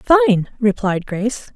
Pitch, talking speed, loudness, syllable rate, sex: 235 Hz, 115 wpm, -18 LUFS, 4.6 syllables/s, female